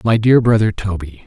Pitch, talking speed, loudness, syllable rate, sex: 105 Hz, 190 wpm, -15 LUFS, 5.1 syllables/s, male